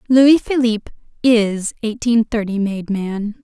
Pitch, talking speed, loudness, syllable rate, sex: 225 Hz, 120 wpm, -17 LUFS, 3.9 syllables/s, female